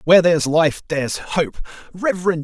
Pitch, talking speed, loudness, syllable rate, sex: 160 Hz, 150 wpm, -18 LUFS, 4.6 syllables/s, male